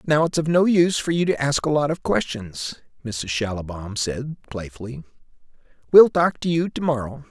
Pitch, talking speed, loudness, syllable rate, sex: 135 Hz, 190 wpm, -21 LUFS, 5.2 syllables/s, male